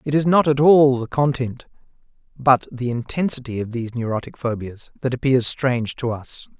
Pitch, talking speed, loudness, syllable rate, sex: 130 Hz, 175 wpm, -20 LUFS, 5.2 syllables/s, male